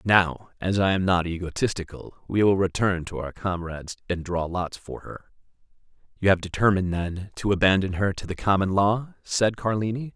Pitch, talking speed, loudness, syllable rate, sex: 95 Hz, 170 wpm, -24 LUFS, 5.2 syllables/s, male